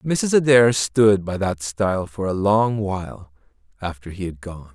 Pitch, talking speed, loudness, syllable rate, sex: 100 Hz, 175 wpm, -20 LUFS, 4.3 syllables/s, male